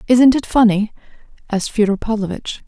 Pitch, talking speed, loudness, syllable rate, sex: 220 Hz, 135 wpm, -17 LUFS, 5.8 syllables/s, female